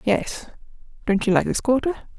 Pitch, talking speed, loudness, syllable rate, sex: 235 Hz, 165 wpm, -22 LUFS, 5.3 syllables/s, female